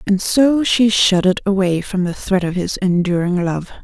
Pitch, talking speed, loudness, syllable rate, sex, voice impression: 190 Hz, 190 wpm, -16 LUFS, 4.9 syllables/s, female, feminine, very adult-like, slightly muffled, slightly sincere, calm, sweet